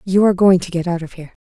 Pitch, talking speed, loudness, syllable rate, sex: 180 Hz, 335 wpm, -16 LUFS, 8.0 syllables/s, female